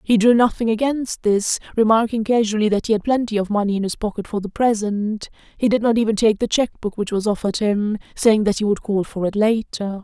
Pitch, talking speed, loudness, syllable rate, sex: 215 Hz, 235 wpm, -19 LUFS, 5.8 syllables/s, female